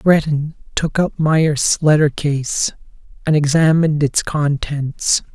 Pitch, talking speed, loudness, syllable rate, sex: 150 Hz, 110 wpm, -17 LUFS, 3.5 syllables/s, male